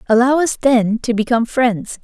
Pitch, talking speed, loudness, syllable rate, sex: 240 Hz, 175 wpm, -16 LUFS, 5.0 syllables/s, female